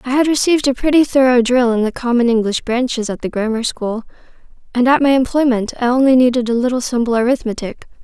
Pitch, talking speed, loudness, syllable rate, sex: 245 Hz, 200 wpm, -15 LUFS, 6.2 syllables/s, female